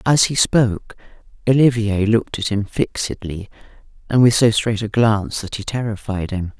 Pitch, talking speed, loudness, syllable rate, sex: 110 Hz, 165 wpm, -18 LUFS, 5.1 syllables/s, female